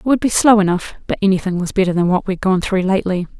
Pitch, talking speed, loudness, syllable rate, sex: 195 Hz, 265 wpm, -16 LUFS, 6.8 syllables/s, female